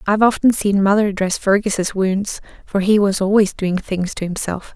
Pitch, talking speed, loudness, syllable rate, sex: 200 Hz, 190 wpm, -18 LUFS, 4.8 syllables/s, female